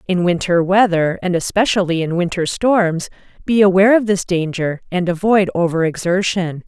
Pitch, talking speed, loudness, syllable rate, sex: 185 Hz, 145 wpm, -16 LUFS, 5.0 syllables/s, female